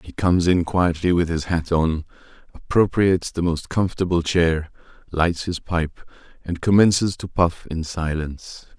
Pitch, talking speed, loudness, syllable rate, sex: 85 Hz, 150 wpm, -21 LUFS, 4.7 syllables/s, male